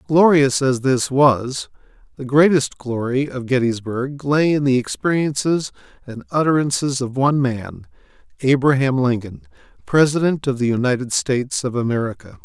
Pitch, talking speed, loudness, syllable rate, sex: 135 Hz, 130 wpm, -18 LUFS, 4.8 syllables/s, male